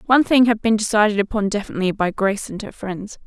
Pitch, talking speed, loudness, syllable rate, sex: 210 Hz, 220 wpm, -19 LUFS, 6.9 syllables/s, female